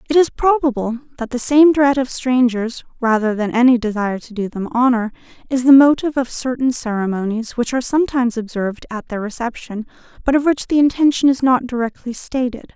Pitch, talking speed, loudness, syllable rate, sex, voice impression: 250 Hz, 185 wpm, -17 LUFS, 5.8 syllables/s, female, very feminine, middle-aged, thin, tensed, slightly powerful, slightly dark, slightly soft, clear, slightly fluent, slightly raspy, slightly cool, intellectual, refreshing, sincere, calm, slightly friendly, reassuring, unique, elegant, wild, slightly sweet, lively, slightly kind, slightly intense, sharp, slightly modest